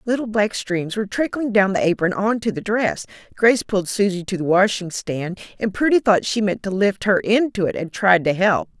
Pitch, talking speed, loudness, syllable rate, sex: 200 Hz, 225 wpm, -20 LUFS, 5.3 syllables/s, female